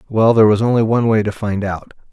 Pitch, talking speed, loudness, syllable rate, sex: 110 Hz, 255 wpm, -15 LUFS, 6.7 syllables/s, male